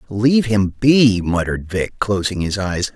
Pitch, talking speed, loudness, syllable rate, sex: 105 Hz, 165 wpm, -17 LUFS, 4.6 syllables/s, male